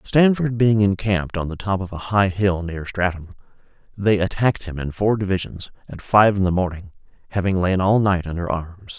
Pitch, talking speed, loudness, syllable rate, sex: 95 Hz, 195 wpm, -20 LUFS, 5.3 syllables/s, male